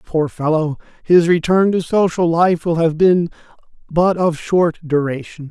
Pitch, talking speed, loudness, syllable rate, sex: 165 Hz, 155 wpm, -16 LUFS, 4.2 syllables/s, male